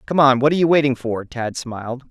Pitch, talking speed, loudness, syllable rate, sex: 135 Hz, 255 wpm, -18 LUFS, 6.2 syllables/s, male